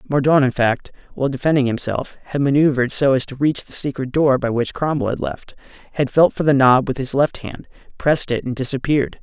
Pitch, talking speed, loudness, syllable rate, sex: 135 Hz, 215 wpm, -18 LUFS, 5.8 syllables/s, male